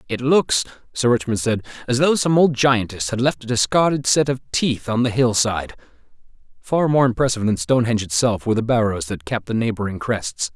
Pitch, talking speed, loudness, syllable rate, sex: 120 Hz, 195 wpm, -19 LUFS, 5.8 syllables/s, male